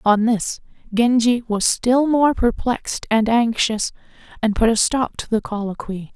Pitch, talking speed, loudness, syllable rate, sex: 230 Hz, 155 wpm, -19 LUFS, 4.3 syllables/s, female